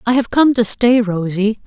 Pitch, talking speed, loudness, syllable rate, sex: 225 Hz, 215 wpm, -15 LUFS, 4.6 syllables/s, female